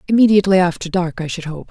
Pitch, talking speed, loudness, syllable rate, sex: 180 Hz, 210 wpm, -16 LUFS, 7.1 syllables/s, female